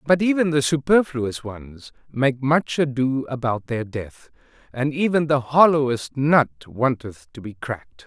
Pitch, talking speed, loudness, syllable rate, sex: 135 Hz, 150 wpm, -21 LUFS, 4.2 syllables/s, male